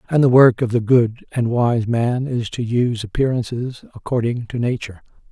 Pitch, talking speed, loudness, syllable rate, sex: 120 Hz, 180 wpm, -19 LUFS, 5.2 syllables/s, male